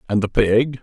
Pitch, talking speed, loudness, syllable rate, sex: 115 Hz, 220 wpm, -18 LUFS, 4.6 syllables/s, male